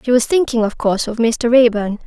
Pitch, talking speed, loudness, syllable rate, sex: 235 Hz, 235 wpm, -15 LUFS, 5.8 syllables/s, female